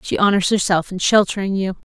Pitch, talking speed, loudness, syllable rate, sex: 190 Hz, 190 wpm, -18 LUFS, 5.8 syllables/s, female